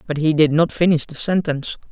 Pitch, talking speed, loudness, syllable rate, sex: 160 Hz, 220 wpm, -18 LUFS, 6.0 syllables/s, female